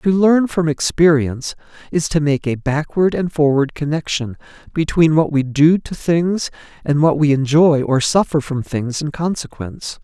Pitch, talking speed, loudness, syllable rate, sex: 155 Hz, 165 wpm, -17 LUFS, 4.6 syllables/s, male